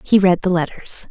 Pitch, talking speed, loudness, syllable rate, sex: 180 Hz, 220 wpm, -17 LUFS, 5.0 syllables/s, female